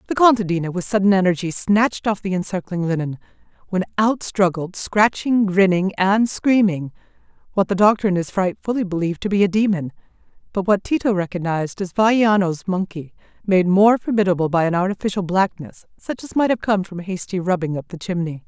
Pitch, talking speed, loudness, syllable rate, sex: 190 Hz, 170 wpm, -19 LUFS, 5.7 syllables/s, female